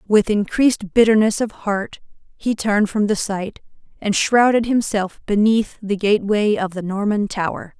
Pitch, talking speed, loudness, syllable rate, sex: 210 Hz, 155 wpm, -19 LUFS, 4.7 syllables/s, female